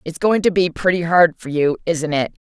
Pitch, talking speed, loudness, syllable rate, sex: 170 Hz, 245 wpm, -17 LUFS, 5.0 syllables/s, female